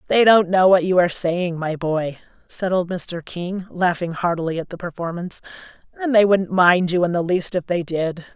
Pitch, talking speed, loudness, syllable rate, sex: 180 Hz, 210 wpm, -20 LUFS, 5.0 syllables/s, female